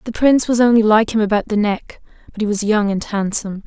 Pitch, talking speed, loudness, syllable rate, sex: 215 Hz, 245 wpm, -16 LUFS, 6.2 syllables/s, female